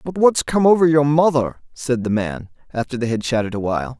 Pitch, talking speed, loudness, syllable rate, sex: 130 Hz, 225 wpm, -18 LUFS, 5.9 syllables/s, male